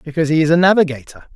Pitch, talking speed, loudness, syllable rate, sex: 155 Hz, 220 wpm, -14 LUFS, 8.8 syllables/s, male